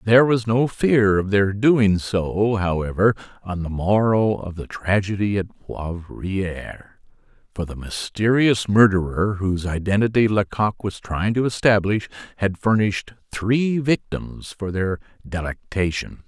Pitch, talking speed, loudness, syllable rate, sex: 100 Hz, 130 wpm, -21 LUFS, 4.2 syllables/s, male